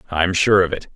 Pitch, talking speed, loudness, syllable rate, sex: 90 Hz, 250 wpm, -17 LUFS, 5.6 syllables/s, male